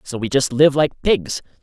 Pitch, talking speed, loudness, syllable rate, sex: 135 Hz, 220 wpm, -18 LUFS, 4.4 syllables/s, male